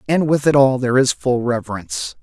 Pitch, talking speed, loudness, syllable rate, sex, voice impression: 130 Hz, 215 wpm, -17 LUFS, 5.9 syllables/s, male, masculine, adult-like, slightly tensed, intellectual, refreshing